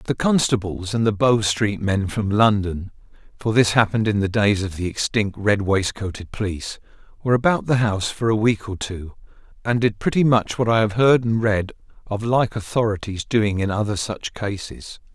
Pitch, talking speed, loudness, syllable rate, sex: 105 Hz, 180 wpm, -21 LUFS, 5.0 syllables/s, male